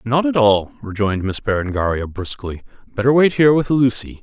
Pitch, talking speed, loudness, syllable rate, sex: 115 Hz, 170 wpm, -17 LUFS, 6.0 syllables/s, male